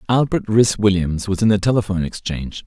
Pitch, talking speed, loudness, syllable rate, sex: 105 Hz, 180 wpm, -18 LUFS, 6.0 syllables/s, male